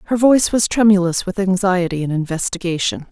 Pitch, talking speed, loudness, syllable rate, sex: 190 Hz, 155 wpm, -17 LUFS, 5.9 syllables/s, female